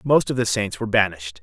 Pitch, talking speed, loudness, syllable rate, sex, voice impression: 105 Hz, 250 wpm, -21 LUFS, 6.8 syllables/s, male, masculine, middle-aged, tensed, powerful, clear, fluent, cool, intellectual, slightly mature, wild, lively, slightly strict, light